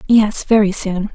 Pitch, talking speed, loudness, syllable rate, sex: 205 Hz, 155 wpm, -15 LUFS, 4.2 syllables/s, female